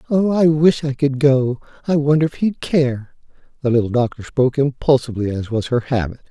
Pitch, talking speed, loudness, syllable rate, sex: 135 Hz, 180 wpm, -18 LUFS, 5.5 syllables/s, male